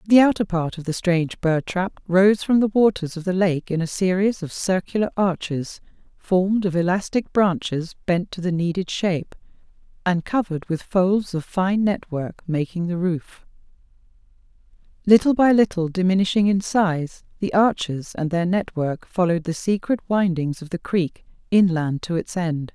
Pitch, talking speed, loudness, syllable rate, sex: 180 Hz, 165 wpm, -21 LUFS, 4.8 syllables/s, female